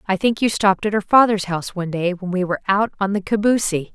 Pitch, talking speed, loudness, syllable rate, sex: 195 Hz, 260 wpm, -19 LUFS, 6.6 syllables/s, female